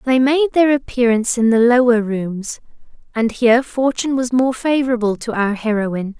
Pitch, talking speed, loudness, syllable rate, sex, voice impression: 240 Hz, 165 wpm, -16 LUFS, 5.4 syllables/s, female, very feminine, young, thin, tensed, slightly powerful, bright, soft, very clear, fluent, very cute, intellectual, very refreshing, slightly sincere, calm, very friendly, very reassuring, unique, very elegant, wild, sweet, lively, kind, slightly sharp, light